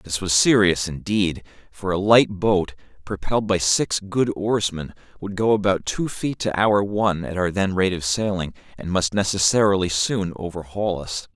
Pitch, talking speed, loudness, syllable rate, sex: 95 Hz, 175 wpm, -21 LUFS, 4.6 syllables/s, male